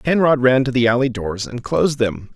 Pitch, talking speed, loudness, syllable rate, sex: 125 Hz, 230 wpm, -18 LUFS, 5.4 syllables/s, male